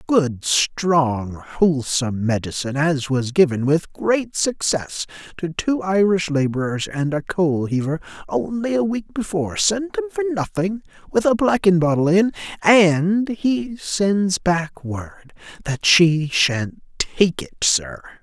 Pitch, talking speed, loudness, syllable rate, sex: 165 Hz, 130 wpm, -20 LUFS, 3.8 syllables/s, male